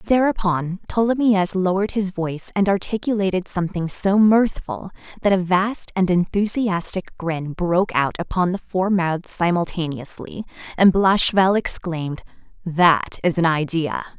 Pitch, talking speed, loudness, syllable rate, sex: 185 Hz, 125 wpm, -20 LUFS, 4.6 syllables/s, female